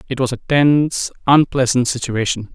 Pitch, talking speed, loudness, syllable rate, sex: 130 Hz, 140 wpm, -16 LUFS, 5.0 syllables/s, male